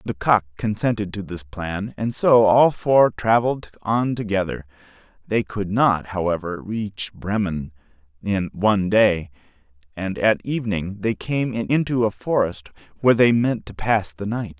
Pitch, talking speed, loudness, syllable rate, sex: 105 Hz, 150 wpm, -21 LUFS, 4.3 syllables/s, male